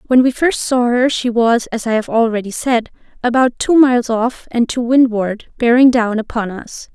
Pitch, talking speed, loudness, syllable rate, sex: 240 Hz, 200 wpm, -15 LUFS, 4.8 syllables/s, female